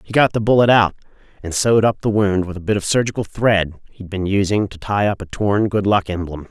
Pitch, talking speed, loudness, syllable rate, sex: 100 Hz, 250 wpm, -18 LUFS, 5.7 syllables/s, male